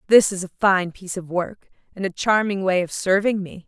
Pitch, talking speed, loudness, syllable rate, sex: 190 Hz, 230 wpm, -21 LUFS, 5.3 syllables/s, female